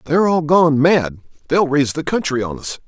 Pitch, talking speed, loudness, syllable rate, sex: 150 Hz, 190 wpm, -16 LUFS, 5.5 syllables/s, male